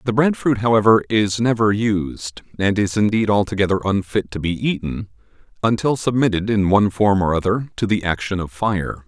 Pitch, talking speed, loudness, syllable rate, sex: 105 Hz, 180 wpm, -19 LUFS, 5.2 syllables/s, male